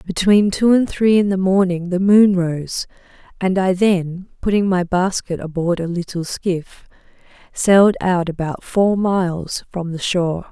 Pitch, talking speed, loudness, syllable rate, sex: 185 Hz, 160 wpm, -17 LUFS, 4.2 syllables/s, female